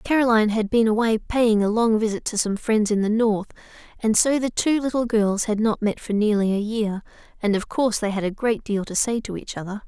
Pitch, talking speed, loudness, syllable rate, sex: 215 Hz, 245 wpm, -22 LUFS, 5.5 syllables/s, female